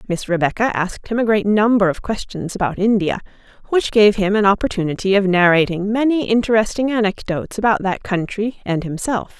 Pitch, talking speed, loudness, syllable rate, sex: 205 Hz, 165 wpm, -18 LUFS, 5.7 syllables/s, female